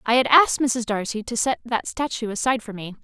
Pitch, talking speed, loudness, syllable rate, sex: 235 Hz, 235 wpm, -21 LUFS, 6.0 syllables/s, female